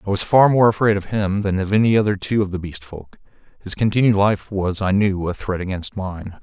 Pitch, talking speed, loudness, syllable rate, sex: 100 Hz, 245 wpm, -19 LUFS, 5.4 syllables/s, male